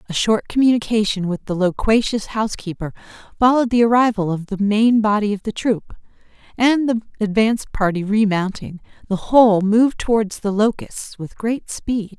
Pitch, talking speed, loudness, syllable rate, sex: 215 Hz, 155 wpm, -18 LUFS, 5.2 syllables/s, female